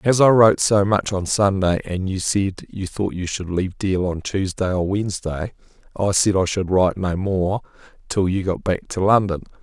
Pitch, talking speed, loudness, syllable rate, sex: 95 Hz, 195 wpm, -20 LUFS, 5.1 syllables/s, male